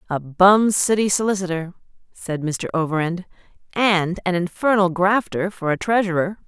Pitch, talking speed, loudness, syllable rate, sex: 185 Hz, 120 wpm, -20 LUFS, 4.5 syllables/s, female